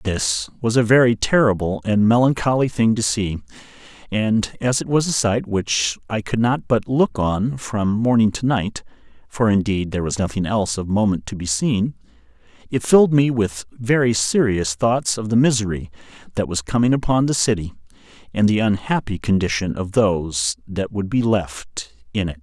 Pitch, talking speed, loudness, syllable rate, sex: 110 Hz, 175 wpm, -19 LUFS, 4.2 syllables/s, male